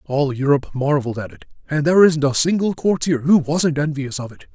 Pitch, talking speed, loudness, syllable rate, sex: 145 Hz, 210 wpm, -18 LUFS, 5.8 syllables/s, male